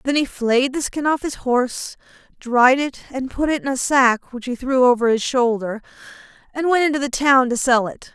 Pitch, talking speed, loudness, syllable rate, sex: 260 Hz, 220 wpm, -19 LUFS, 5.0 syllables/s, female